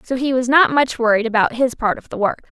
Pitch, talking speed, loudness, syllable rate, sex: 245 Hz, 280 wpm, -17 LUFS, 6.0 syllables/s, female